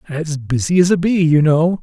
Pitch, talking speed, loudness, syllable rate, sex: 160 Hz, 230 wpm, -15 LUFS, 4.9 syllables/s, male